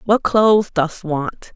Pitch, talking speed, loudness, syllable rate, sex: 190 Hz, 155 wpm, -17 LUFS, 3.6 syllables/s, female